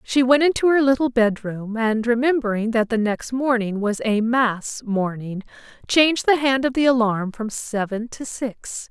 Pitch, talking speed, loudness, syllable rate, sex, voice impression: 235 Hz, 175 wpm, -20 LUFS, 4.5 syllables/s, female, feminine, adult-like, tensed, powerful, clear, fluent, intellectual, slightly elegant, lively, slightly strict, slightly sharp